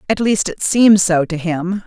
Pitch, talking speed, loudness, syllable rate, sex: 190 Hz, 225 wpm, -15 LUFS, 4.8 syllables/s, female